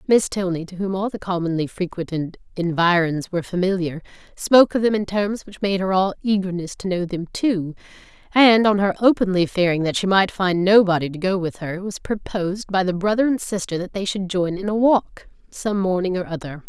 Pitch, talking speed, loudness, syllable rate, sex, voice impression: 190 Hz, 210 wpm, -20 LUFS, 5.5 syllables/s, female, feminine, middle-aged, tensed, bright, slightly clear, intellectual, calm, friendly, lively, slightly sharp